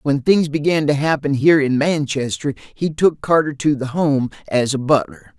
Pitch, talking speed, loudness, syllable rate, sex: 145 Hz, 190 wpm, -18 LUFS, 4.8 syllables/s, male